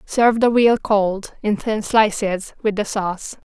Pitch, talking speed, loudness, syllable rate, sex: 210 Hz, 170 wpm, -19 LUFS, 4.1 syllables/s, female